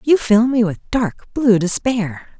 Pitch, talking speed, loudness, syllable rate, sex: 220 Hz, 175 wpm, -17 LUFS, 3.7 syllables/s, female